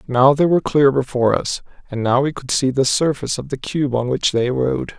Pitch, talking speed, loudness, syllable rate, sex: 135 Hz, 240 wpm, -18 LUFS, 5.5 syllables/s, male